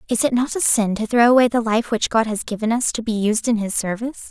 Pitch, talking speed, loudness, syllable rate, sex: 230 Hz, 295 wpm, -19 LUFS, 6.1 syllables/s, female